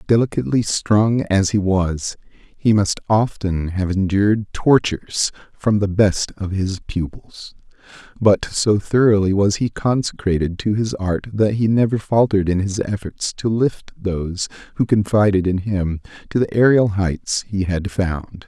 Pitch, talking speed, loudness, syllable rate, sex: 100 Hz, 155 wpm, -19 LUFS, 4.3 syllables/s, male